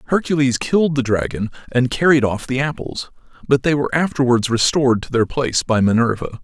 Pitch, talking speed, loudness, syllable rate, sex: 130 Hz, 175 wpm, -18 LUFS, 6.0 syllables/s, male